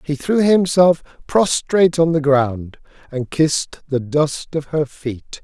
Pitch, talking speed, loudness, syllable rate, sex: 150 Hz, 155 wpm, -18 LUFS, 3.6 syllables/s, male